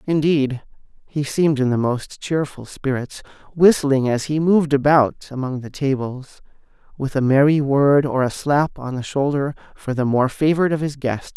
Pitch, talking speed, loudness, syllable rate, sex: 140 Hz, 175 wpm, -19 LUFS, 4.8 syllables/s, male